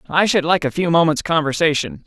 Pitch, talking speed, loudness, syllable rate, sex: 165 Hz, 205 wpm, -17 LUFS, 5.9 syllables/s, male